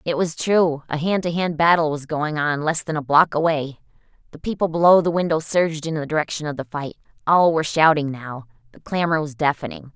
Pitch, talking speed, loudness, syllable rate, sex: 155 Hz, 215 wpm, -20 LUFS, 5.6 syllables/s, female